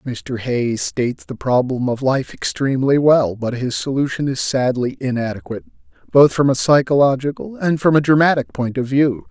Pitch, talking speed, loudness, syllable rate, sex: 130 Hz, 170 wpm, -17 LUFS, 5.1 syllables/s, male